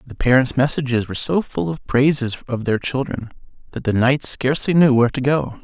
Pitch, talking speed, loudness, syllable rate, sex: 130 Hz, 200 wpm, -19 LUFS, 5.7 syllables/s, male